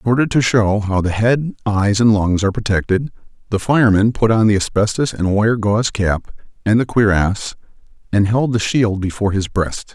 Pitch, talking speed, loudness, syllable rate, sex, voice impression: 105 Hz, 195 wpm, -16 LUFS, 5.2 syllables/s, male, very masculine, very adult-like, thick, slightly muffled, cool, intellectual, slightly calm